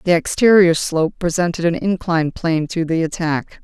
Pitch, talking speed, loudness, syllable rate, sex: 170 Hz, 165 wpm, -17 LUFS, 5.4 syllables/s, female